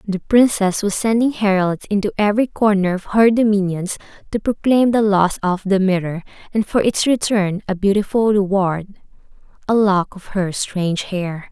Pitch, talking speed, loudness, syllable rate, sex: 200 Hz, 155 wpm, -18 LUFS, 4.7 syllables/s, female